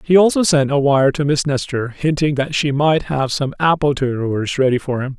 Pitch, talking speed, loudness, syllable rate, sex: 140 Hz, 220 wpm, -17 LUFS, 5.2 syllables/s, male